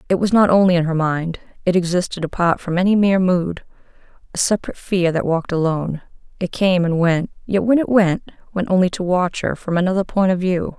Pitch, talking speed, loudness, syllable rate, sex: 180 Hz, 205 wpm, -18 LUFS, 6.0 syllables/s, female